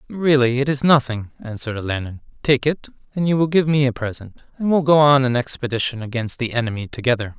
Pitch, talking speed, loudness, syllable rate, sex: 130 Hz, 205 wpm, -19 LUFS, 6.1 syllables/s, male